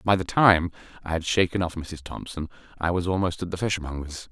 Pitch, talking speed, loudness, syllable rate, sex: 85 Hz, 210 wpm, -25 LUFS, 5.6 syllables/s, male